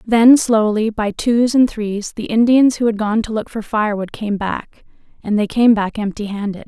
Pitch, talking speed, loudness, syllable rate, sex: 220 Hz, 205 wpm, -16 LUFS, 4.8 syllables/s, female